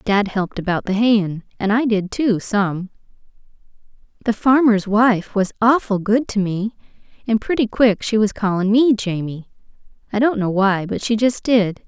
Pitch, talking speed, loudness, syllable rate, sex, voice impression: 210 Hz, 165 wpm, -18 LUFS, 4.6 syllables/s, female, very feminine, adult-like, slightly cute, slightly refreshing, friendly, slightly sweet